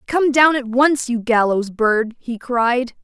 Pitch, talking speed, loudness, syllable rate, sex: 245 Hz, 180 wpm, -17 LUFS, 3.6 syllables/s, female